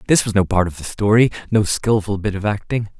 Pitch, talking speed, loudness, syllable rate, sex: 105 Hz, 240 wpm, -18 LUFS, 5.9 syllables/s, male